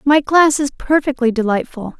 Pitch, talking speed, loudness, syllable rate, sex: 270 Hz, 150 wpm, -15 LUFS, 4.8 syllables/s, female